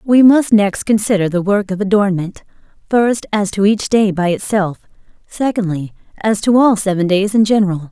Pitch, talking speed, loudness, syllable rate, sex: 205 Hz, 175 wpm, -15 LUFS, 4.9 syllables/s, female